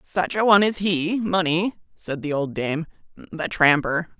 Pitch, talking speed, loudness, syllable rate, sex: 175 Hz, 170 wpm, -21 LUFS, 4.2 syllables/s, male